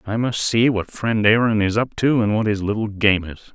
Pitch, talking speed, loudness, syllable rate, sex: 110 Hz, 255 wpm, -19 LUFS, 5.2 syllables/s, male